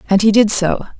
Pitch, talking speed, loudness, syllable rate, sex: 205 Hz, 240 wpm, -13 LUFS, 5.6 syllables/s, female